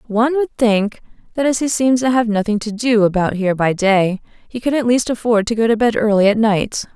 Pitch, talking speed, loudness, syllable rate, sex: 225 Hz, 240 wpm, -16 LUFS, 5.6 syllables/s, female